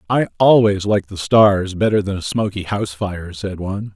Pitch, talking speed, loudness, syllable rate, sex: 100 Hz, 195 wpm, -17 LUFS, 5.2 syllables/s, male